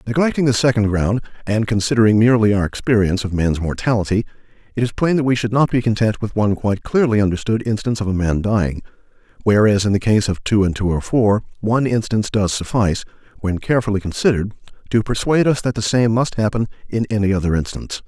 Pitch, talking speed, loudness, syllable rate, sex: 110 Hz, 200 wpm, -18 LUFS, 6.7 syllables/s, male